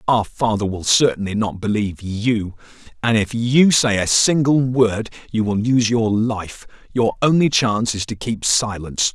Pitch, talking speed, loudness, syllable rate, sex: 110 Hz, 170 wpm, -18 LUFS, 4.5 syllables/s, male